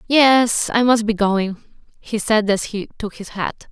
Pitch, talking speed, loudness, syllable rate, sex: 215 Hz, 195 wpm, -18 LUFS, 4.0 syllables/s, female